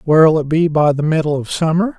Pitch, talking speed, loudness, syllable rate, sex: 160 Hz, 240 wpm, -15 LUFS, 5.9 syllables/s, male